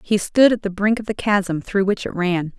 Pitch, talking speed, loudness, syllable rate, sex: 200 Hz, 280 wpm, -19 LUFS, 4.9 syllables/s, female